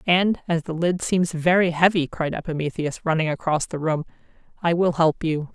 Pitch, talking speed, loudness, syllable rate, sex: 165 Hz, 185 wpm, -22 LUFS, 5.0 syllables/s, female